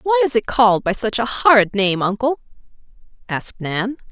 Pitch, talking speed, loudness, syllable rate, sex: 235 Hz, 175 wpm, -17 LUFS, 5.4 syllables/s, female